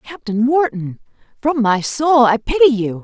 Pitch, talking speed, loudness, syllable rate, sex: 250 Hz, 160 wpm, -15 LUFS, 4.3 syllables/s, female